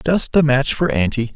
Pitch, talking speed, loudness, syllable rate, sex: 140 Hz, 220 wpm, -17 LUFS, 4.9 syllables/s, male